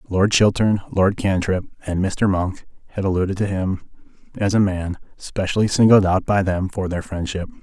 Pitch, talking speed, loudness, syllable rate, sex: 95 Hz, 175 wpm, -20 LUFS, 5.0 syllables/s, male